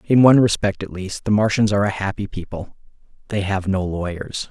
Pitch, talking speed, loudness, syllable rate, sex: 100 Hz, 200 wpm, -20 LUFS, 5.7 syllables/s, male